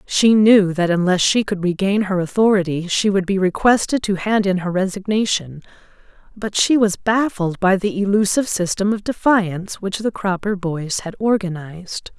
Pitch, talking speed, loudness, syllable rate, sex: 195 Hz, 165 wpm, -18 LUFS, 4.9 syllables/s, female